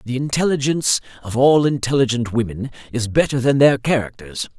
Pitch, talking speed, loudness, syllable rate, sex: 125 Hz, 145 wpm, -18 LUFS, 5.5 syllables/s, male